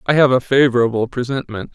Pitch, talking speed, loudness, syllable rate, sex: 125 Hz, 170 wpm, -16 LUFS, 6.8 syllables/s, male